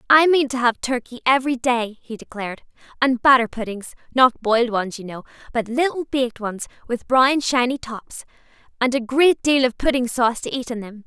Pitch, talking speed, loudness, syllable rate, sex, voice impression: 245 Hz, 195 wpm, -20 LUFS, 5.4 syllables/s, female, very feminine, young, very thin, very tensed, powerful, very bright, soft, very clear, very fluent, slightly raspy, very cute, intellectual, very refreshing, sincere, slightly calm, very friendly, very reassuring, very unique, very elegant, very sweet, very lively, kind, slightly intense, modest, very light